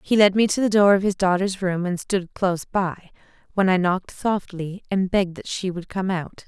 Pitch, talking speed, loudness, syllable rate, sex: 190 Hz, 230 wpm, -22 LUFS, 5.1 syllables/s, female